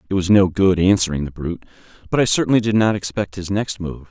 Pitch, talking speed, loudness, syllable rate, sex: 95 Hz, 235 wpm, -18 LUFS, 6.4 syllables/s, male